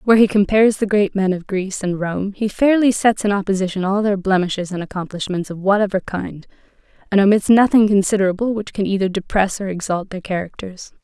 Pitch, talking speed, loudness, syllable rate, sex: 195 Hz, 190 wpm, -18 LUFS, 6.0 syllables/s, female